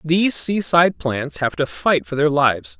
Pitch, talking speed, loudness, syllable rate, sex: 145 Hz, 195 wpm, -18 LUFS, 4.8 syllables/s, male